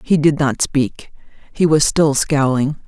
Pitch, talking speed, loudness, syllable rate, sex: 145 Hz, 165 wpm, -16 LUFS, 3.9 syllables/s, female